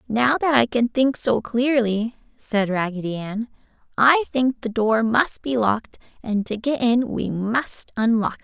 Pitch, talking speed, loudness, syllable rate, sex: 235 Hz, 180 wpm, -21 LUFS, 4.2 syllables/s, female